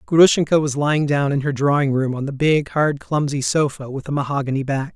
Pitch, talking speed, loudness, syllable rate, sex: 140 Hz, 220 wpm, -19 LUFS, 5.6 syllables/s, male